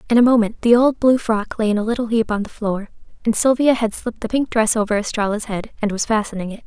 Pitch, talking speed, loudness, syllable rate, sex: 225 Hz, 260 wpm, -19 LUFS, 6.3 syllables/s, female